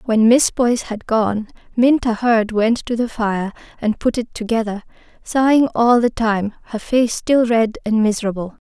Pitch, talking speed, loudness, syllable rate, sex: 230 Hz, 175 wpm, -18 LUFS, 4.6 syllables/s, female